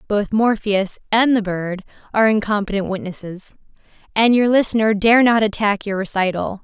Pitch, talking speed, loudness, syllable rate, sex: 210 Hz, 145 wpm, -18 LUFS, 5.1 syllables/s, female